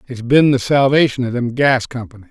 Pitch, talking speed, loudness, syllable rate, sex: 125 Hz, 210 wpm, -15 LUFS, 5.6 syllables/s, male